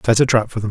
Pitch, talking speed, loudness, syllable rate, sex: 115 Hz, 425 wpm, -16 LUFS, 7.8 syllables/s, male